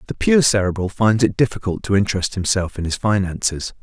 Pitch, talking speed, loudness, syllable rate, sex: 100 Hz, 190 wpm, -19 LUFS, 5.9 syllables/s, male